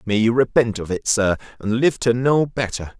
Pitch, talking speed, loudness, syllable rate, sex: 115 Hz, 220 wpm, -19 LUFS, 4.9 syllables/s, male